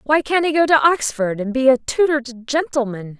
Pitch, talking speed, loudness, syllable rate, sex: 270 Hz, 225 wpm, -18 LUFS, 5.2 syllables/s, female